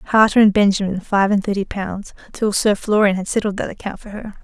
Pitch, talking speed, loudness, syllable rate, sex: 200 Hz, 215 wpm, -18 LUFS, 5.5 syllables/s, female